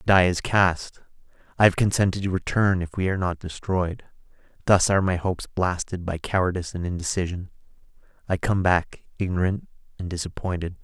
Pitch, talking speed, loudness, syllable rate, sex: 90 Hz, 160 wpm, -24 LUFS, 5.7 syllables/s, male